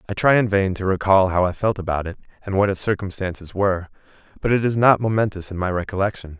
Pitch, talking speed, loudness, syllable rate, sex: 95 Hz, 225 wpm, -20 LUFS, 6.5 syllables/s, male